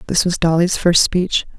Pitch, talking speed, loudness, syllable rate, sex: 175 Hz, 190 wpm, -16 LUFS, 4.6 syllables/s, female